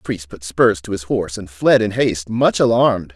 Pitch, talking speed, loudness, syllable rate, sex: 100 Hz, 250 wpm, -17 LUFS, 5.5 syllables/s, male